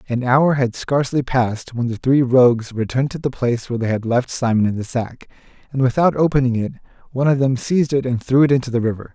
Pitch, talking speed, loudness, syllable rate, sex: 125 Hz, 235 wpm, -18 LUFS, 6.4 syllables/s, male